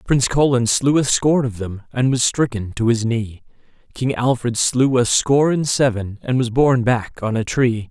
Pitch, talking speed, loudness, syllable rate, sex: 120 Hz, 205 wpm, -18 LUFS, 4.9 syllables/s, male